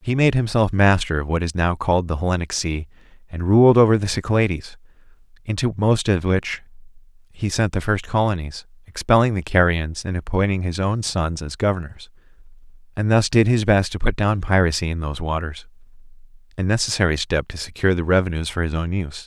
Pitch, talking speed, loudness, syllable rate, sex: 95 Hz, 180 wpm, -20 LUFS, 5.7 syllables/s, male